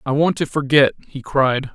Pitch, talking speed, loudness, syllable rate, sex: 140 Hz, 205 wpm, -18 LUFS, 4.7 syllables/s, male